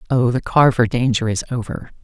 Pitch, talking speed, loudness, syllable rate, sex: 120 Hz, 175 wpm, -18 LUFS, 5.4 syllables/s, female